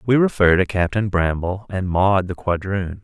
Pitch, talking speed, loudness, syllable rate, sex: 95 Hz, 180 wpm, -19 LUFS, 4.6 syllables/s, male